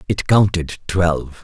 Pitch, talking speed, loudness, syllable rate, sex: 85 Hz, 125 wpm, -18 LUFS, 4.2 syllables/s, male